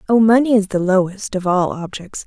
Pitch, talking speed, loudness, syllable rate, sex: 200 Hz, 210 wpm, -17 LUFS, 5.3 syllables/s, female